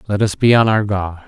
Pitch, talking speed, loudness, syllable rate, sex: 100 Hz, 280 wpm, -15 LUFS, 5.5 syllables/s, male